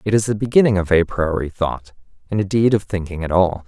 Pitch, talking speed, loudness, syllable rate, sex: 95 Hz, 230 wpm, -18 LUFS, 5.9 syllables/s, male